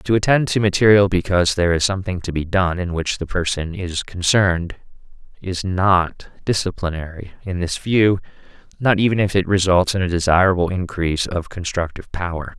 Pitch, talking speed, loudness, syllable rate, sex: 90 Hz, 165 wpm, -19 LUFS, 5.5 syllables/s, male